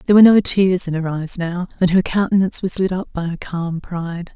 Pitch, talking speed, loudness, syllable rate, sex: 180 Hz, 250 wpm, -18 LUFS, 6.0 syllables/s, female